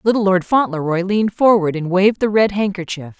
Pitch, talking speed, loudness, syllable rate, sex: 195 Hz, 190 wpm, -16 LUFS, 5.8 syllables/s, female